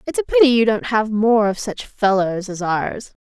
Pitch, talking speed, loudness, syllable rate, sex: 210 Hz, 225 wpm, -18 LUFS, 4.7 syllables/s, female